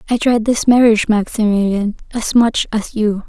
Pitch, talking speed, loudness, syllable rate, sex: 220 Hz, 165 wpm, -15 LUFS, 4.8 syllables/s, female